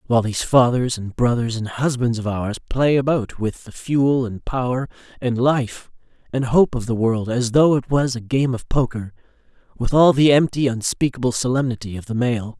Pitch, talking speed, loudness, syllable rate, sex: 125 Hz, 190 wpm, -20 LUFS, 5.0 syllables/s, male